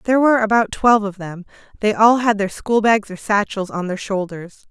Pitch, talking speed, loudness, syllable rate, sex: 210 Hz, 215 wpm, -17 LUFS, 5.5 syllables/s, female